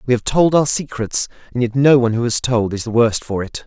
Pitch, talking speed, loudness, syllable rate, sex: 120 Hz, 280 wpm, -17 LUFS, 6.1 syllables/s, male